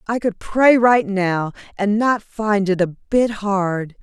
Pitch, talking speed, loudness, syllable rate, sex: 205 Hz, 180 wpm, -18 LUFS, 3.3 syllables/s, female